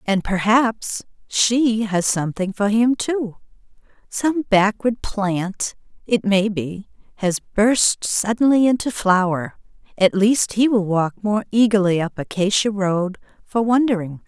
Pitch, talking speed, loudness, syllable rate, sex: 210 Hz, 130 wpm, -19 LUFS, 3.8 syllables/s, female